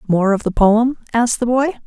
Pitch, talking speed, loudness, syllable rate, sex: 230 Hz, 225 wpm, -16 LUFS, 5.3 syllables/s, female